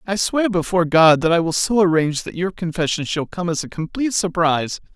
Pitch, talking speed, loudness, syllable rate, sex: 175 Hz, 220 wpm, -19 LUFS, 6.0 syllables/s, male